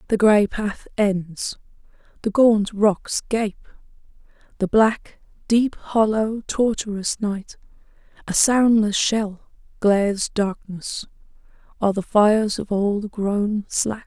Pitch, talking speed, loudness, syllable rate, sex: 210 Hz, 110 wpm, -21 LUFS, 3.2 syllables/s, female